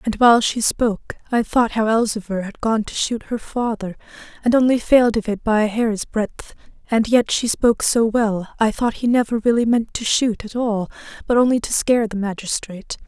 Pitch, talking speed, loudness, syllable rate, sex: 225 Hz, 205 wpm, -19 LUFS, 5.2 syllables/s, female